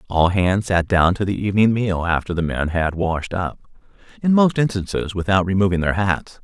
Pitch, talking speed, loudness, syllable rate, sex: 95 Hz, 195 wpm, -19 LUFS, 5.2 syllables/s, male